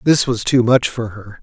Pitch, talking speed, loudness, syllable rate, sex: 120 Hz, 255 wpm, -16 LUFS, 4.6 syllables/s, male